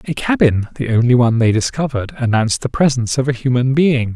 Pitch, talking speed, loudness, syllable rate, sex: 130 Hz, 200 wpm, -16 LUFS, 6.4 syllables/s, male